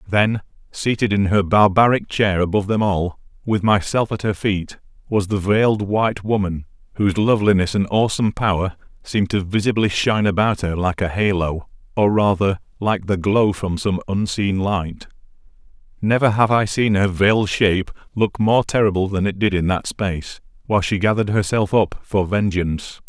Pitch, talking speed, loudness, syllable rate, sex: 100 Hz, 170 wpm, -19 LUFS, 5.3 syllables/s, male